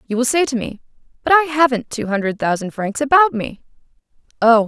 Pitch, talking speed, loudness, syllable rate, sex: 250 Hz, 195 wpm, -17 LUFS, 6.0 syllables/s, female